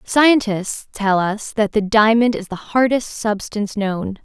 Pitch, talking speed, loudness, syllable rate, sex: 215 Hz, 155 wpm, -18 LUFS, 3.9 syllables/s, female